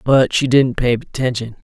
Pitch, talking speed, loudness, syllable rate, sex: 125 Hz, 175 wpm, -17 LUFS, 4.7 syllables/s, male